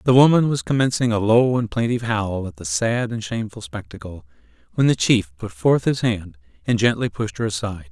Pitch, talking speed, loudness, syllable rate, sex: 110 Hz, 205 wpm, -20 LUFS, 5.6 syllables/s, male